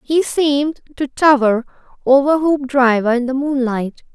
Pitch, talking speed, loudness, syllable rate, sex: 270 Hz, 130 wpm, -16 LUFS, 4.3 syllables/s, female